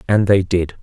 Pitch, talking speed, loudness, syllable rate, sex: 95 Hz, 215 wpm, -16 LUFS, 4.7 syllables/s, male